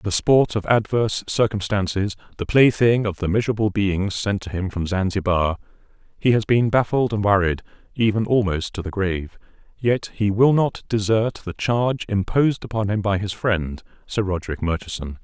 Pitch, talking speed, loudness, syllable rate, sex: 100 Hz, 165 wpm, -21 LUFS, 5.1 syllables/s, male